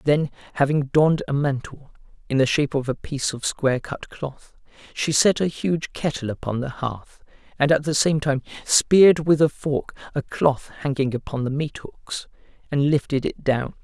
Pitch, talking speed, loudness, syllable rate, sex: 140 Hz, 180 wpm, -22 LUFS, 4.9 syllables/s, male